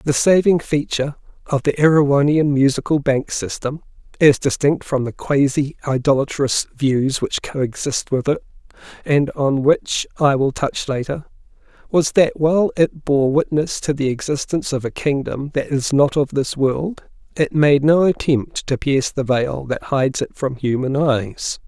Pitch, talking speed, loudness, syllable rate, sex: 140 Hz, 165 wpm, -18 LUFS, 3.3 syllables/s, male